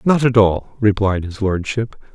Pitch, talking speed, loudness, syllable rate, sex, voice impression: 110 Hz, 170 wpm, -17 LUFS, 4.2 syllables/s, male, masculine, adult-like, sincere, slightly calm, slightly elegant